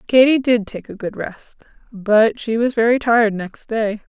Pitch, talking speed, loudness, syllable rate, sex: 225 Hz, 190 wpm, -17 LUFS, 4.4 syllables/s, female